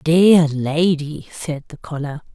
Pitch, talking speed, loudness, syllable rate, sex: 155 Hz, 130 wpm, -18 LUFS, 3.5 syllables/s, female